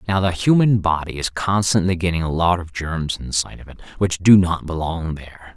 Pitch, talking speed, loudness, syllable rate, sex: 90 Hz, 205 wpm, -19 LUFS, 5.4 syllables/s, male